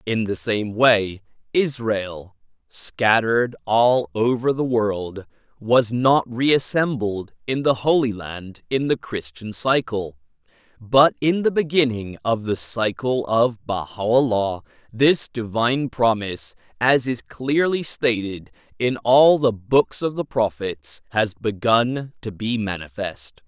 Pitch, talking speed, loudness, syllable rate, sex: 115 Hz, 125 wpm, -21 LUFS, 3.6 syllables/s, male